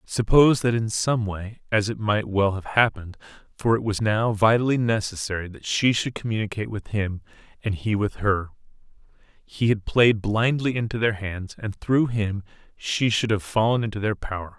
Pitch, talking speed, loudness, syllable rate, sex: 105 Hz, 180 wpm, -23 LUFS, 5.0 syllables/s, male